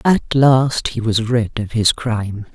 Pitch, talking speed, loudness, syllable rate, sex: 115 Hz, 190 wpm, -17 LUFS, 3.8 syllables/s, female